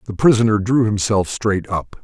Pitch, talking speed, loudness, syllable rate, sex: 105 Hz, 175 wpm, -17 LUFS, 4.9 syllables/s, male